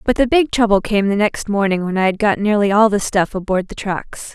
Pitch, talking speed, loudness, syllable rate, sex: 205 Hz, 260 wpm, -17 LUFS, 5.4 syllables/s, female